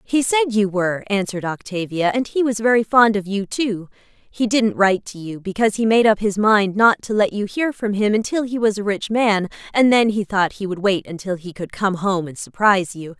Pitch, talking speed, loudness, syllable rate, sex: 205 Hz, 240 wpm, -19 LUFS, 5.2 syllables/s, female